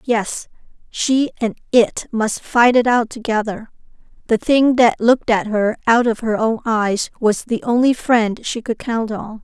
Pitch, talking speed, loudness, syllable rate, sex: 230 Hz, 180 wpm, -17 LUFS, 4.2 syllables/s, female